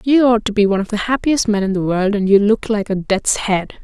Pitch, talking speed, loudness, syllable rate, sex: 210 Hz, 295 wpm, -16 LUFS, 5.7 syllables/s, female